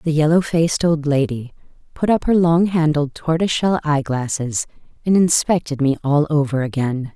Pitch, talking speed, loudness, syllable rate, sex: 155 Hz, 160 wpm, -18 LUFS, 5.0 syllables/s, female